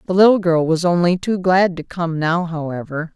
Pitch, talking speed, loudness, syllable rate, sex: 170 Hz, 210 wpm, -17 LUFS, 5.0 syllables/s, female